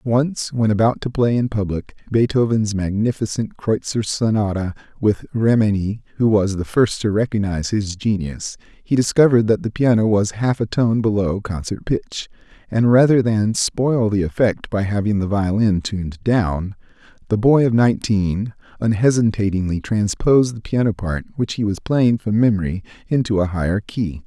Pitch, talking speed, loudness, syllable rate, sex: 105 Hz, 160 wpm, -19 LUFS, 4.9 syllables/s, male